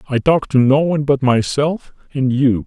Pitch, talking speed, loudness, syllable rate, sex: 135 Hz, 205 wpm, -16 LUFS, 4.8 syllables/s, male